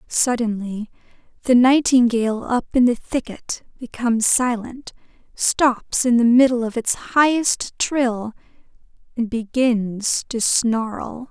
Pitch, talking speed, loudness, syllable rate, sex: 240 Hz, 110 wpm, -19 LUFS, 3.6 syllables/s, female